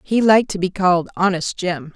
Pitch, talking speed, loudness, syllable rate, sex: 185 Hz, 215 wpm, -18 LUFS, 5.6 syllables/s, female